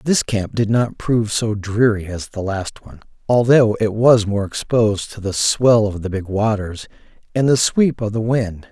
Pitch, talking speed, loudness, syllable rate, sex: 110 Hz, 200 wpm, -18 LUFS, 4.5 syllables/s, male